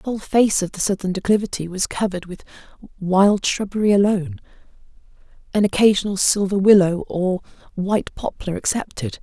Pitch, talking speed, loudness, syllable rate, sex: 195 Hz, 130 wpm, -19 LUFS, 5.7 syllables/s, female